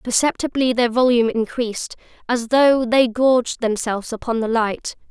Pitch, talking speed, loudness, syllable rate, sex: 240 Hz, 130 wpm, -19 LUFS, 5.0 syllables/s, female